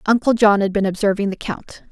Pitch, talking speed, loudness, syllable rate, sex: 205 Hz, 220 wpm, -18 LUFS, 5.6 syllables/s, female